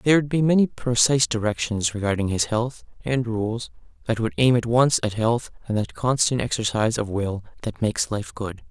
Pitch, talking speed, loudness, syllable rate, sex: 115 Hz, 195 wpm, -23 LUFS, 5.3 syllables/s, male